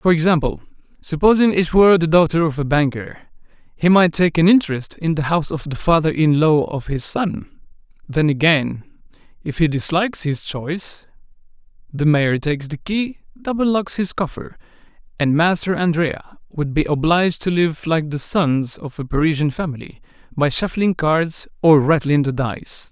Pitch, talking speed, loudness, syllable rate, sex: 160 Hz, 170 wpm, -18 LUFS, 5.0 syllables/s, male